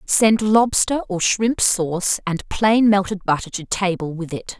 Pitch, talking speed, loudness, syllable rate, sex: 195 Hz, 170 wpm, -19 LUFS, 4.1 syllables/s, female